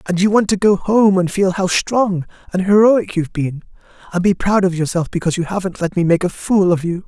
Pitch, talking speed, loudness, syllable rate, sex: 185 Hz, 245 wpm, -16 LUFS, 5.7 syllables/s, male